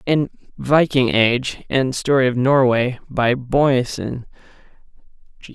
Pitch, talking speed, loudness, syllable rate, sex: 130 Hz, 110 wpm, -18 LUFS, 3.9 syllables/s, male